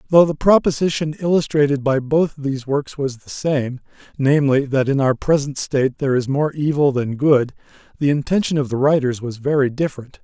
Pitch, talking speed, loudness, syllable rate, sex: 140 Hz, 180 wpm, -19 LUFS, 5.5 syllables/s, male